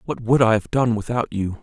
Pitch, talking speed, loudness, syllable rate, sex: 115 Hz, 260 wpm, -20 LUFS, 5.4 syllables/s, male